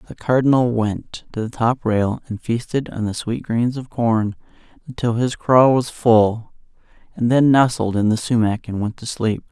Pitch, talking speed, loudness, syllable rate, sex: 115 Hz, 190 wpm, -19 LUFS, 4.5 syllables/s, male